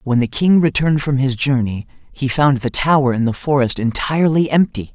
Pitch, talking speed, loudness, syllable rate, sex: 135 Hz, 195 wpm, -16 LUFS, 5.4 syllables/s, male